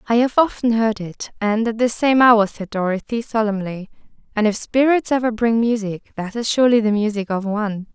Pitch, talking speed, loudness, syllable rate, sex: 220 Hz, 190 wpm, -19 LUFS, 5.3 syllables/s, female